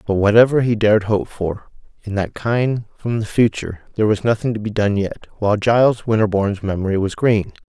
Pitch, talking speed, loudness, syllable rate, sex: 105 Hz, 195 wpm, -18 LUFS, 5.8 syllables/s, male